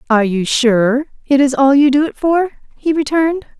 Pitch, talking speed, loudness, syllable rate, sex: 275 Hz, 200 wpm, -14 LUFS, 5.2 syllables/s, female